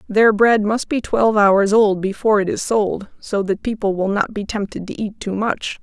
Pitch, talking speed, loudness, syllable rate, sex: 210 Hz, 225 wpm, -18 LUFS, 4.9 syllables/s, female